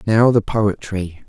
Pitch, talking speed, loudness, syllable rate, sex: 105 Hz, 140 wpm, -18 LUFS, 3.5 syllables/s, male